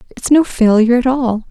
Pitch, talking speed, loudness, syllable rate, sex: 245 Hz, 200 wpm, -13 LUFS, 6.0 syllables/s, female